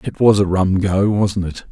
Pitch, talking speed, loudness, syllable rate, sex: 95 Hz, 245 wpm, -16 LUFS, 4.4 syllables/s, male